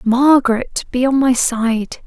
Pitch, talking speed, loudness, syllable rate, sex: 250 Hz, 145 wpm, -15 LUFS, 3.7 syllables/s, female